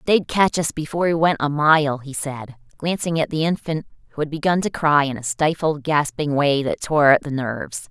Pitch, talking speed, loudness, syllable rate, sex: 150 Hz, 220 wpm, -20 LUFS, 5.1 syllables/s, female